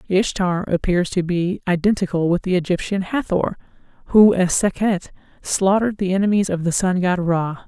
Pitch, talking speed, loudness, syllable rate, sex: 185 Hz, 155 wpm, -19 LUFS, 5.2 syllables/s, female